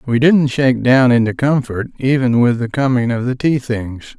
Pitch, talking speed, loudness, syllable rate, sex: 125 Hz, 200 wpm, -15 LUFS, 4.8 syllables/s, male